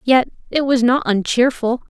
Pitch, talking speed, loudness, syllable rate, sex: 245 Hz, 150 wpm, -17 LUFS, 4.6 syllables/s, female